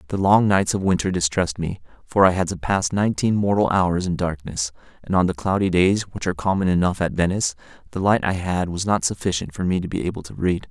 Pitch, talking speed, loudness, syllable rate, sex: 90 Hz, 235 wpm, -21 LUFS, 6.1 syllables/s, male